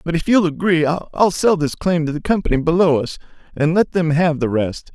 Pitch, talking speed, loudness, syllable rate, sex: 165 Hz, 230 wpm, -17 LUFS, 5.1 syllables/s, male